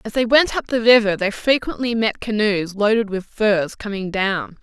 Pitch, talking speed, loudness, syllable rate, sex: 215 Hz, 195 wpm, -19 LUFS, 4.7 syllables/s, female